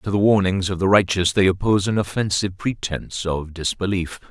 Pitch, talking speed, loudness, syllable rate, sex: 95 Hz, 180 wpm, -20 LUFS, 5.7 syllables/s, male